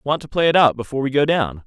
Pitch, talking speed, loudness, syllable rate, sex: 135 Hz, 325 wpm, -18 LUFS, 6.8 syllables/s, male